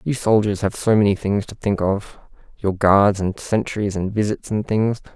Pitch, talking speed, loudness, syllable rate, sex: 105 Hz, 185 wpm, -20 LUFS, 4.6 syllables/s, male